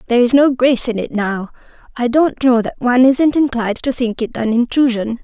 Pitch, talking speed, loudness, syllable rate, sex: 245 Hz, 205 wpm, -15 LUFS, 5.5 syllables/s, female